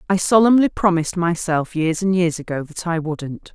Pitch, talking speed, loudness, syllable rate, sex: 175 Hz, 185 wpm, -19 LUFS, 5.0 syllables/s, female